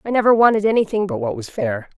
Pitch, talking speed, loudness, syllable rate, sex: 230 Hz, 240 wpm, -18 LUFS, 6.6 syllables/s, female